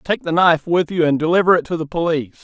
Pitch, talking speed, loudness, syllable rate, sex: 165 Hz, 270 wpm, -17 LUFS, 7.1 syllables/s, male